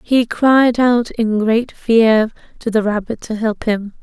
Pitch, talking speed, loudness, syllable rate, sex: 225 Hz, 180 wpm, -16 LUFS, 3.6 syllables/s, female